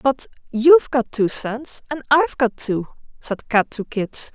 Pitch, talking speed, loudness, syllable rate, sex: 250 Hz, 180 wpm, -20 LUFS, 4.2 syllables/s, female